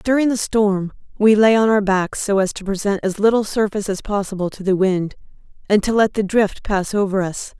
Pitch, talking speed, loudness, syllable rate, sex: 205 Hz, 220 wpm, -18 LUFS, 5.4 syllables/s, female